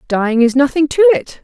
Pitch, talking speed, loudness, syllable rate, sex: 285 Hz, 210 wpm, -13 LUFS, 6.1 syllables/s, female